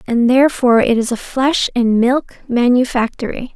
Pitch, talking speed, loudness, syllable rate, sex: 245 Hz, 150 wpm, -15 LUFS, 4.8 syllables/s, female